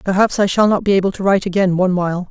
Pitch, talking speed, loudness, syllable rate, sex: 190 Hz, 285 wpm, -16 LUFS, 7.7 syllables/s, female